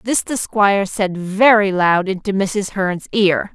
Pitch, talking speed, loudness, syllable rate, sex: 195 Hz, 170 wpm, -16 LUFS, 3.9 syllables/s, female